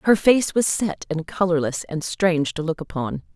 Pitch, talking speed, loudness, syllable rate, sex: 170 Hz, 195 wpm, -22 LUFS, 4.9 syllables/s, female